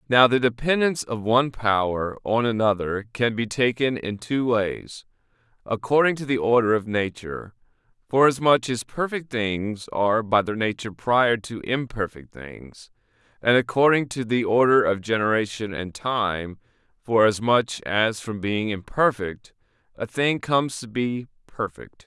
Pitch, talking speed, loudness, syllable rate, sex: 115 Hz, 140 wpm, -23 LUFS, 4.5 syllables/s, male